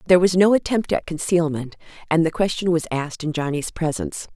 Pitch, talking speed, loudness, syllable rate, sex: 170 Hz, 195 wpm, -21 LUFS, 6.2 syllables/s, female